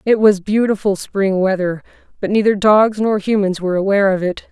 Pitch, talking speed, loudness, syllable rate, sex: 200 Hz, 185 wpm, -16 LUFS, 5.5 syllables/s, female